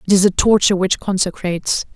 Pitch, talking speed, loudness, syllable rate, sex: 190 Hz, 185 wpm, -16 LUFS, 6.3 syllables/s, female